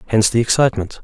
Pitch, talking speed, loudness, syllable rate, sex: 110 Hz, 175 wpm, -16 LUFS, 8.2 syllables/s, male